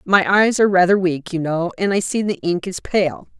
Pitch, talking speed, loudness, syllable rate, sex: 185 Hz, 245 wpm, -18 LUFS, 5.0 syllables/s, female